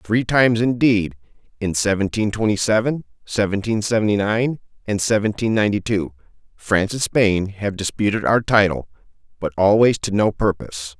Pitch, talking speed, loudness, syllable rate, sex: 105 Hz, 130 wpm, -19 LUFS, 5.3 syllables/s, male